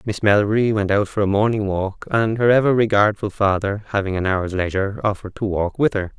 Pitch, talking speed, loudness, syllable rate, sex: 105 Hz, 215 wpm, -19 LUFS, 5.8 syllables/s, male